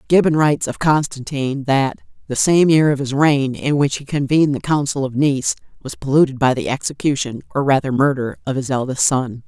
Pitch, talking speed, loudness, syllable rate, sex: 140 Hz, 195 wpm, -18 LUFS, 5.5 syllables/s, female